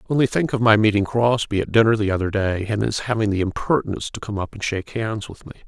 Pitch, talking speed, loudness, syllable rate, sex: 110 Hz, 255 wpm, -21 LUFS, 6.6 syllables/s, male